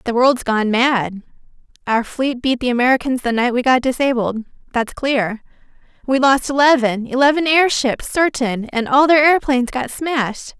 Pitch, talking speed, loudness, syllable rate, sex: 255 Hz, 155 wpm, -16 LUFS, 4.9 syllables/s, female